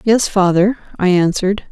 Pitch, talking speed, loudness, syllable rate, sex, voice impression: 195 Hz, 140 wpm, -15 LUFS, 5.2 syllables/s, female, feminine, adult-like, slightly soft, calm, sweet